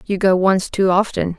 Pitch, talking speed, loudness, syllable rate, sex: 190 Hz, 215 wpm, -17 LUFS, 4.7 syllables/s, female